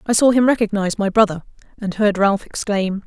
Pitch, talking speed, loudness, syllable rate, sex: 205 Hz, 195 wpm, -18 LUFS, 5.8 syllables/s, female